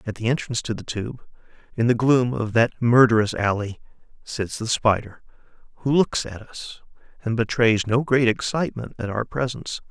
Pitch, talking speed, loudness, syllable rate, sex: 115 Hz, 170 wpm, -22 LUFS, 5.2 syllables/s, male